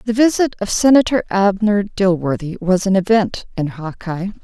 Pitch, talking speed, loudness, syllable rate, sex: 200 Hz, 150 wpm, -17 LUFS, 4.8 syllables/s, female